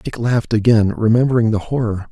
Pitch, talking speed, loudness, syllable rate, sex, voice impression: 115 Hz, 170 wpm, -16 LUFS, 6.0 syllables/s, male, very masculine, very adult-like, very middle-aged, very thick, tensed, slightly weak, slightly bright, slightly hard, clear, fluent, slightly raspy, cool, very intellectual, very sincere, very calm, very mature, friendly, very reassuring, unique, elegant, wild, slightly sweet, slightly lively, very kind, slightly modest